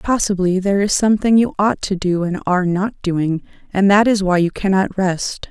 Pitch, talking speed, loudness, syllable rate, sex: 190 Hz, 205 wpm, -17 LUFS, 5.1 syllables/s, female